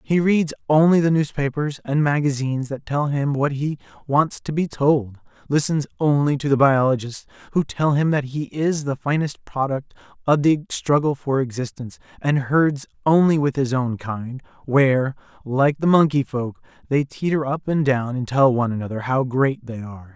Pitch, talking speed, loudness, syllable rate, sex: 140 Hz, 180 wpm, -21 LUFS, 4.9 syllables/s, male